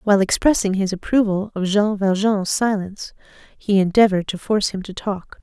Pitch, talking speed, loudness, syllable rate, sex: 200 Hz, 165 wpm, -19 LUFS, 5.5 syllables/s, female